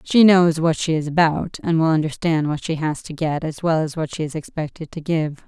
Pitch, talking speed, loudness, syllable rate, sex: 160 Hz, 250 wpm, -20 LUFS, 5.3 syllables/s, female